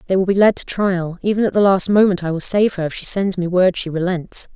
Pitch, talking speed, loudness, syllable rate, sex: 185 Hz, 275 wpm, -17 LUFS, 5.8 syllables/s, female